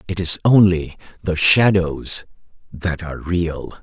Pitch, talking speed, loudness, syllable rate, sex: 85 Hz, 125 wpm, -18 LUFS, 3.9 syllables/s, male